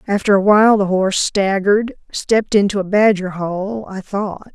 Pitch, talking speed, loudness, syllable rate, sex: 200 Hz, 160 wpm, -16 LUFS, 4.9 syllables/s, female